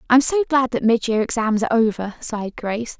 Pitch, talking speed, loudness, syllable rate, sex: 235 Hz, 220 wpm, -20 LUFS, 6.0 syllables/s, female